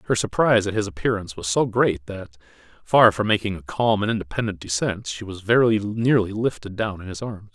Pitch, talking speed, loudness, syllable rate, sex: 105 Hz, 205 wpm, -22 LUFS, 5.7 syllables/s, male